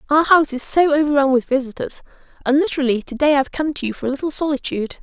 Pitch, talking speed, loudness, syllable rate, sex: 280 Hz, 240 wpm, -18 LUFS, 7.3 syllables/s, female